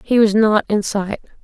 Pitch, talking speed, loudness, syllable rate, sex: 210 Hz, 210 wpm, -17 LUFS, 4.5 syllables/s, female